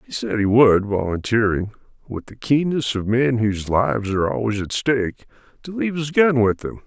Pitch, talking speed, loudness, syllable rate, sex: 115 Hz, 190 wpm, -20 LUFS, 5.6 syllables/s, male